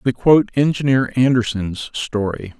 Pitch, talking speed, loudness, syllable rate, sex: 120 Hz, 115 wpm, -18 LUFS, 4.6 syllables/s, male